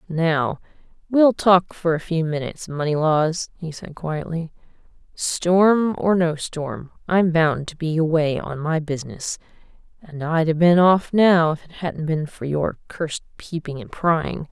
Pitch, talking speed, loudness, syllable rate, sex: 165 Hz, 160 wpm, -21 LUFS, 4.0 syllables/s, female